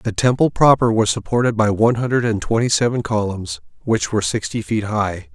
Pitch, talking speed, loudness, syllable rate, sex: 115 Hz, 190 wpm, -18 LUFS, 5.5 syllables/s, male